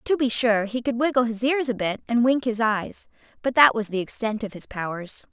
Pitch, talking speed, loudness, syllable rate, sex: 230 Hz, 250 wpm, -23 LUFS, 5.3 syllables/s, female